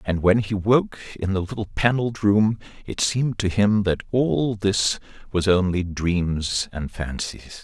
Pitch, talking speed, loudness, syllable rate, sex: 100 Hz, 165 wpm, -22 LUFS, 4.1 syllables/s, male